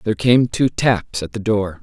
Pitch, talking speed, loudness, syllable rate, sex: 110 Hz, 230 wpm, -18 LUFS, 4.7 syllables/s, male